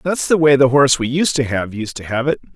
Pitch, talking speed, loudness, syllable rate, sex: 135 Hz, 305 wpm, -16 LUFS, 6.0 syllables/s, male